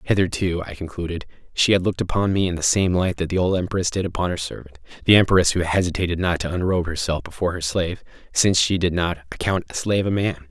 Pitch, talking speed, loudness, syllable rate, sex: 90 Hz, 225 wpm, -21 LUFS, 6.6 syllables/s, male